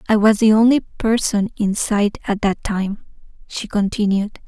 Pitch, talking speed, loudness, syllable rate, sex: 210 Hz, 160 wpm, -18 LUFS, 4.4 syllables/s, female